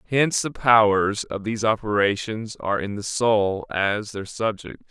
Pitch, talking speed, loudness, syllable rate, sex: 105 Hz, 160 wpm, -22 LUFS, 4.6 syllables/s, male